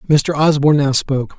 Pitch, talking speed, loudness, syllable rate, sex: 145 Hz, 175 wpm, -15 LUFS, 5.8 syllables/s, male